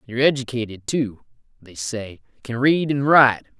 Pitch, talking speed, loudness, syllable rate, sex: 120 Hz, 150 wpm, -20 LUFS, 5.1 syllables/s, male